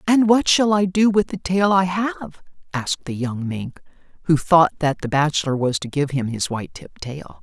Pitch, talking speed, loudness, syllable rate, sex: 165 Hz, 220 wpm, -20 LUFS, 5.0 syllables/s, female